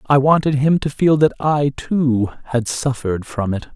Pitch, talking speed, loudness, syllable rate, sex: 135 Hz, 190 wpm, -18 LUFS, 4.6 syllables/s, male